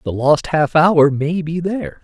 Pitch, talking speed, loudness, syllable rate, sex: 155 Hz, 205 wpm, -16 LUFS, 4.2 syllables/s, male